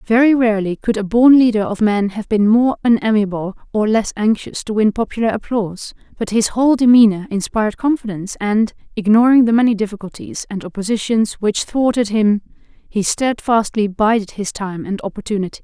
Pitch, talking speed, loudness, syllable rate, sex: 215 Hz, 160 wpm, -16 LUFS, 5.5 syllables/s, female